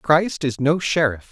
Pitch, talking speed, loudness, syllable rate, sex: 145 Hz, 185 wpm, -20 LUFS, 3.9 syllables/s, male